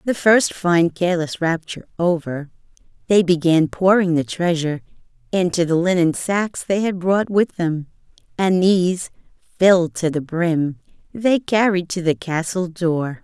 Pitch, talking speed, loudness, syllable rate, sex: 175 Hz, 145 wpm, -19 LUFS, 4.4 syllables/s, female